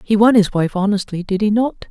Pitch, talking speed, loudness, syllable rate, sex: 205 Hz, 220 wpm, -16 LUFS, 5.6 syllables/s, female